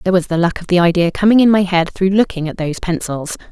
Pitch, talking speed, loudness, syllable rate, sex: 180 Hz, 275 wpm, -15 LUFS, 6.6 syllables/s, female